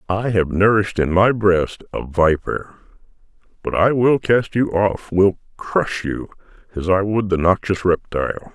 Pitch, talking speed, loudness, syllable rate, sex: 95 Hz, 155 wpm, -18 LUFS, 4.4 syllables/s, male